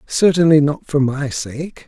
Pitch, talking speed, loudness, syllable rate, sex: 145 Hz, 160 wpm, -16 LUFS, 4.1 syllables/s, male